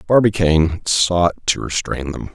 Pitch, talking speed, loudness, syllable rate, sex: 90 Hz, 130 wpm, -17 LUFS, 4.5 syllables/s, male